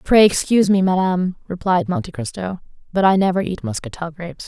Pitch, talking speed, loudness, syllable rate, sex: 180 Hz, 175 wpm, -19 LUFS, 6.1 syllables/s, female